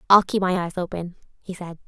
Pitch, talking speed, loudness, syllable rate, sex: 180 Hz, 225 wpm, -23 LUFS, 5.8 syllables/s, female